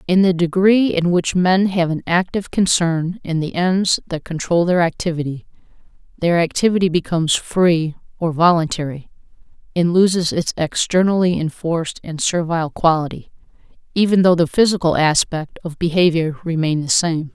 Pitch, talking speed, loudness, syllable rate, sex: 170 Hz, 140 wpm, -17 LUFS, 5.1 syllables/s, female